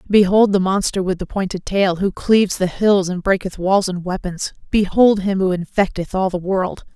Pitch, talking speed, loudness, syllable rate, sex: 190 Hz, 200 wpm, -18 LUFS, 4.9 syllables/s, female